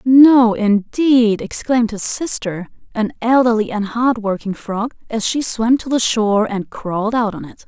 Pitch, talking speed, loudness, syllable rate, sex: 225 Hz, 165 wpm, -16 LUFS, 4.4 syllables/s, female